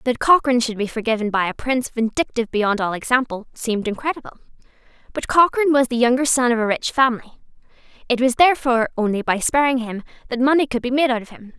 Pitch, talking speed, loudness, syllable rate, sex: 245 Hz, 200 wpm, -19 LUFS, 6.8 syllables/s, female